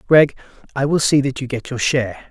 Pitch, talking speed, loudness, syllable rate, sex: 135 Hz, 235 wpm, -18 LUFS, 5.7 syllables/s, male